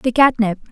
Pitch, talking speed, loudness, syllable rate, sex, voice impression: 235 Hz, 250 wpm, -16 LUFS, 5.3 syllables/s, female, feminine, slightly gender-neutral, slightly young, slightly adult-like, thin, slightly relaxed, weak, slightly bright, soft, clear, fluent, cute, intellectual, slightly refreshing, very sincere, calm, friendly, slightly reassuring, unique, very elegant, sweet, kind, very modest